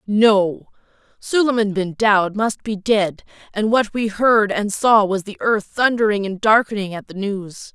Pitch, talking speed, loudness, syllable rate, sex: 210 Hz, 170 wpm, -18 LUFS, 4.1 syllables/s, female